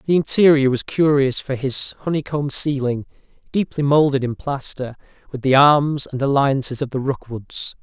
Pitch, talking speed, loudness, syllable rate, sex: 140 Hz, 155 wpm, -19 LUFS, 4.7 syllables/s, male